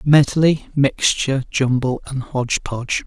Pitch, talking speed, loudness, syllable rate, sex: 135 Hz, 115 wpm, -19 LUFS, 4.2 syllables/s, male